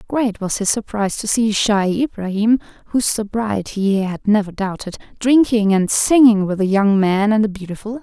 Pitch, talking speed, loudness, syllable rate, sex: 210 Hz, 185 wpm, -17 LUFS, 5.3 syllables/s, female